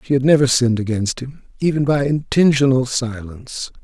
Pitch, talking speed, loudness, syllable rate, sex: 130 Hz, 155 wpm, -17 LUFS, 5.5 syllables/s, male